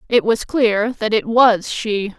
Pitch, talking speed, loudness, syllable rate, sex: 220 Hz, 190 wpm, -17 LUFS, 3.5 syllables/s, female